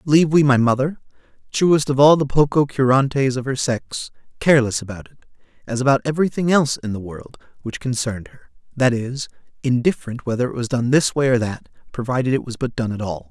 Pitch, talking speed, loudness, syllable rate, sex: 130 Hz, 180 wpm, -19 LUFS, 7.9 syllables/s, male